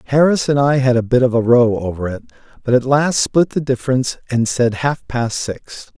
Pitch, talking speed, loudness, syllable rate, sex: 125 Hz, 220 wpm, -16 LUFS, 5.3 syllables/s, male